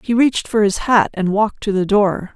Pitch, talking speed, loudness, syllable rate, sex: 210 Hz, 255 wpm, -16 LUFS, 5.4 syllables/s, female